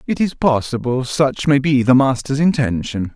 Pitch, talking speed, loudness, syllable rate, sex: 135 Hz, 170 wpm, -17 LUFS, 4.7 syllables/s, male